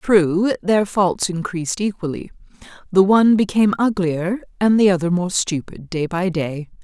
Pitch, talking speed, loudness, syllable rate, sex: 185 Hz, 150 wpm, -18 LUFS, 4.6 syllables/s, female